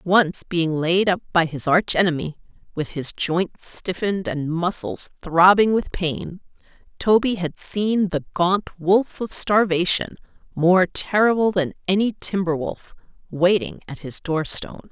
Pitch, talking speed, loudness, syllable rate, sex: 180 Hz, 140 wpm, -20 LUFS, 4.0 syllables/s, female